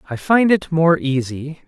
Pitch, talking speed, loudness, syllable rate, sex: 155 Hz, 180 wpm, -16 LUFS, 4.1 syllables/s, male